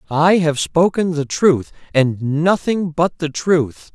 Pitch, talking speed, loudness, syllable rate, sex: 160 Hz, 150 wpm, -17 LUFS, 3.4 syllables/s, male